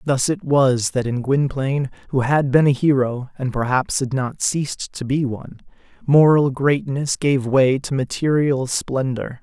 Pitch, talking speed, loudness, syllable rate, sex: 135 Hz, 165 wpm, -19 LUFS, 4.3 syllables/s, male